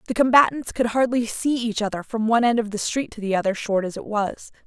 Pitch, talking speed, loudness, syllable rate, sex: 225 Hz, 255 wpm, -22 LUFS, 6.0 syllables/s, female